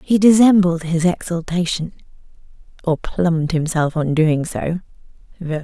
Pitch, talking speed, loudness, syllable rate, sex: 170 Hz, 95 wpm, -18 LUFS, 4.4 syllables/s, female